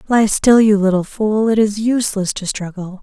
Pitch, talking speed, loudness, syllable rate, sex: 210 Hz, 200 wpm, -15 LUFS, 4.9 syllables/s, female